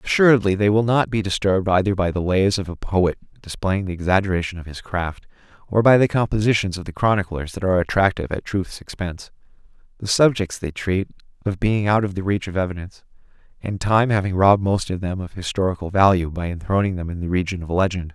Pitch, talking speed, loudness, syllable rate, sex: 95 Hz, 205 wpm, -20 LUFS, 6.2 syllables/s, male